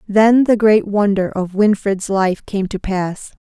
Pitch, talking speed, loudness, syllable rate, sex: 200 Hz, 175 wpm, -16 LUFS, 3.8 syllables/s, female